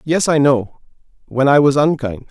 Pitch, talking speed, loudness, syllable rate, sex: 140 Hz, 180 wpm, -15 LUFS, 4.6 syllables/s, male